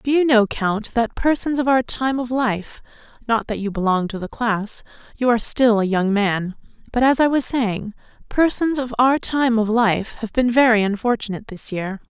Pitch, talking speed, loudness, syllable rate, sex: 230 Hz, 195 wpm, -19 LUFS, 4.8 syllables/s, female